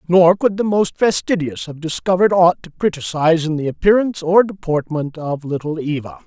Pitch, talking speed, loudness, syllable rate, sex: 165 Hz, 170 wpm, -17 LUFS, 5.6 syllables/s, male